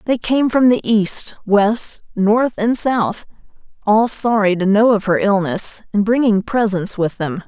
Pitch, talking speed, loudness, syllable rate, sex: 210 Hz, 170 wpm, -16 LUFS, 3.9 syllables/s, female